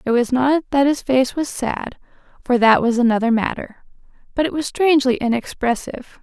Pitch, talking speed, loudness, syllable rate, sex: 260 Hz, 175 wpm, -18 LUFS, 5.3 syllables/s, female